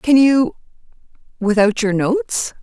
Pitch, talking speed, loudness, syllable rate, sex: 230 Hz, 90 wpm, -16 LUFS, 4.1 syllables/s, female